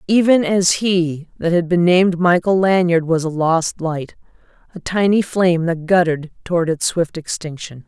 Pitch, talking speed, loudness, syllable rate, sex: 175 Hz, 170 wpm, -17 LUFS, 4.8 syllables/s, female